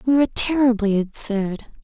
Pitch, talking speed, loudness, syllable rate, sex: 230 Hz, 130 wpm, -19 LUFS, 5.0 syllables/s, female